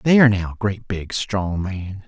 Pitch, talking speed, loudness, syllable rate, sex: 100 Hz, 175 wpm, -21 LUFS, 3.5 syllables/s, male